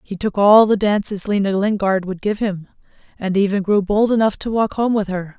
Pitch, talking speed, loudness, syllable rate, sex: 200 Hz, 225 wpm, -18 LUFS, 5.2 syllables/s, female